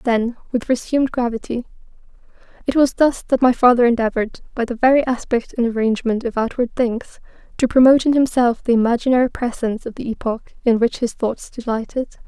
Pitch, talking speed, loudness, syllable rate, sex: 240 Hz, 165 wpm, -18 LUFS, 6.0 syllables/s, female